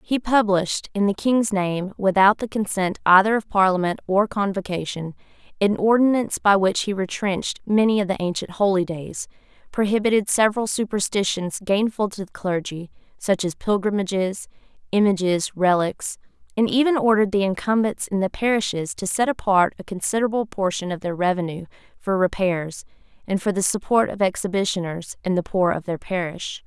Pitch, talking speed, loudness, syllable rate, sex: 195 Hz, 155 wpm, -21 LUFS, 5.3 syllables/s, female